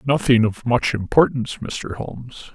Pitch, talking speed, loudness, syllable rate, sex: 120 Hz, 140 wpm, -20 LUFS, 4.7 syllables/s, male